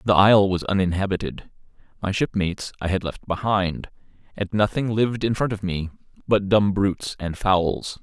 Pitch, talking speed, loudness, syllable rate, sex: 100 Hz, 165 wpm, -22 LUFS, 5.2 syllables/s, male